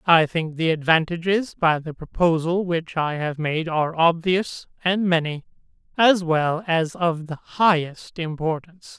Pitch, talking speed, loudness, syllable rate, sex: 165 Hz, 145 wpm, -21 LUFS, 4.2 syllables/s, male